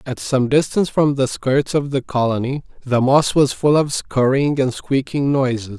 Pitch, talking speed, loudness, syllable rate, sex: 135 Hz, 185 wpm, -18 LUFS, 4.6 syllables/s, male